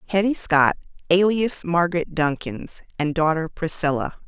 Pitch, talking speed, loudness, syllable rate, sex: 170 Hz, 110 wpm, -21 LUFS, 4.7 syllables/s, female